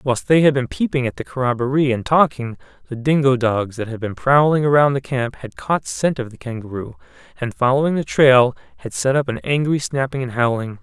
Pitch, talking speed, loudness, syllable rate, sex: 130 Hz, 210 wpm, -18 LUFS, 5.4 syllables/s, male